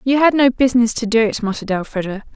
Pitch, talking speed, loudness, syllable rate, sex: 235 Hz, 230 wpm, -16 LUFS, 6.9 syllables/s, female